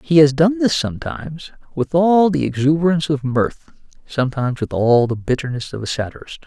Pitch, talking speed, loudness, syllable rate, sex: 145 Hz, 175 wpm, -18 LUFS, 5.7 syllables/s, male